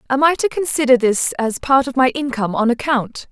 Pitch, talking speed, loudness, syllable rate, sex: 255 Hz, 215 wpm, -17 LUFS, 5.5 syllables/s, female